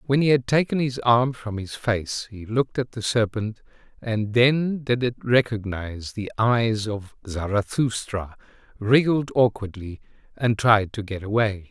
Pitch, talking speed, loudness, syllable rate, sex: 115 Hz, 155 wpm, -23 LUFS, 4.3 syllables/s, male